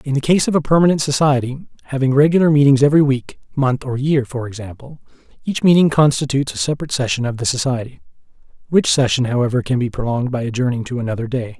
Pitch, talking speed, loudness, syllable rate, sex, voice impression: 135 Hz, 190 wpm, -17 LUFS, 6.8 syllables/s, male, masculine, adult-like, slightly thick, slightly muffled, fluent, slightly cool, sincere